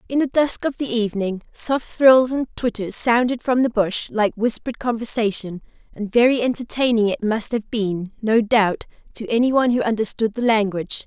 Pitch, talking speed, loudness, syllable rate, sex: 230 Hz, 180 wpm, -20 LUFS, 5.2 syllables/s, female